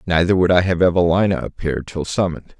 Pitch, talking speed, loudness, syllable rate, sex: 85 Hz, 185 wpm, -18 LUFS, 6.2 syllables/s, male